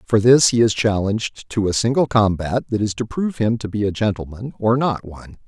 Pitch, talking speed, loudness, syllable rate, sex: 110 Hz, 230 wpm, -19 LUFS, 5.6 syllables/s, male